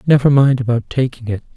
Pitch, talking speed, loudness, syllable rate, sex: 125 Hz, 190 wpm, -15 LUFS, 6.1 syllables/s, male